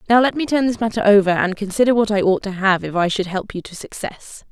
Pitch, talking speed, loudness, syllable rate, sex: 205 Hz, 280 wpm, -18 LUFS, 6.1 syllables/s, female